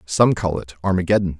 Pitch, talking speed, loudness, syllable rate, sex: 90 Hz, 170 wpm, -20 LUFS, 5.9 syllables/s, male